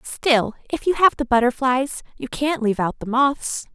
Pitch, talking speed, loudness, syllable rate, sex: 260 Hz, 190 wpm, -20 LUFS, 4.6 syllables/s, female